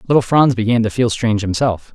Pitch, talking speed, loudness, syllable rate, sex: 115 Hz, 215 wpm, -16 LUFS, 6.2 syllables/s, male